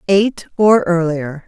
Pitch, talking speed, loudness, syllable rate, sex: 180 Hz, 120 wpm, -15 LUFS, 3.4 syllables/s, female